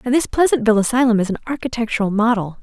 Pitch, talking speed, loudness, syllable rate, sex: 230 Hz, 185 wpm, -17 LUFS, 7.4 syllables/s, female